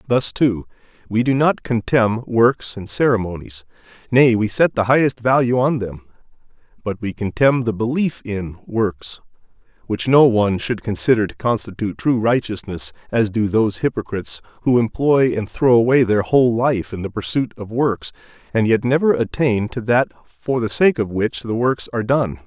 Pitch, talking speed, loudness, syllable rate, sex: 115 Hz, 170 wpm, -18 LUFS, 4.9 syllables/s, male